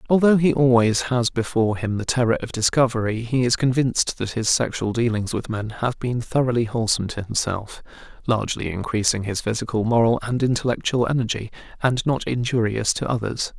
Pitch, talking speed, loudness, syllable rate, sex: 115 Hz, 170 wpm, -22 LUFS, 5.6 syllables/s, male